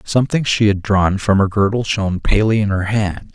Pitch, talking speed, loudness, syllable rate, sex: 100 Hz, 215 wpm, -16 LUFS, 5.5 syllables/s, male